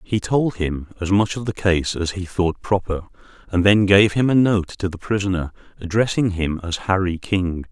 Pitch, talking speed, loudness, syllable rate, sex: 95 Hz, 200 wpm, -20 LUFS, 4.7 syllables/s, male